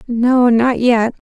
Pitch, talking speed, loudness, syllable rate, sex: 240 Hz, 140 wpm, -13 LUFS, 2.9 syllables/s, female